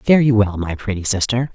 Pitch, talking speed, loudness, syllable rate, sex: 110 Hz, 230 wpm, -17 LUFS, 5.3 syllables/s, female